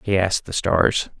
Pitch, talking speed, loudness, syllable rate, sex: 95 Hz, 200 wpm, -20 LUFS, 4.8 syllables/s, male